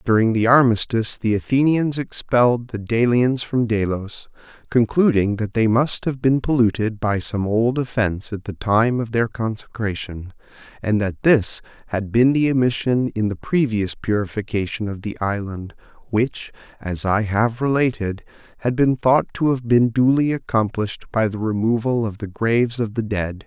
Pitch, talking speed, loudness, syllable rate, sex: 115 Hz, 160 wpm, -20 LUFS, 4.8 syllables/s, male